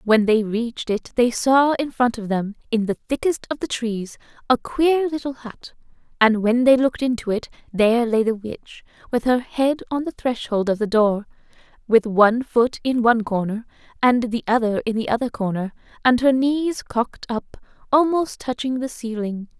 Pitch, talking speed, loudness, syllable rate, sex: 235 Hz, 185 wpm, -21 LUFS, 4.8 syllables/s, female